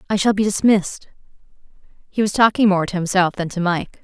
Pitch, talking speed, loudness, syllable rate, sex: 195 Hz, 195 wpm, -18 LUFS, 6.0 syllables/s, female